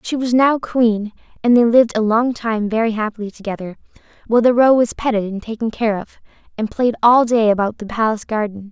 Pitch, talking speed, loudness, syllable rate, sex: 225 Hz, 205 wpm, -17 LUFS, 5.8 syllables/s, female